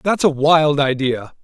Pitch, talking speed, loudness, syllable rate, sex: 145 Hz, 165 wpm, -16 LUFS, 3.9 syllables/s, male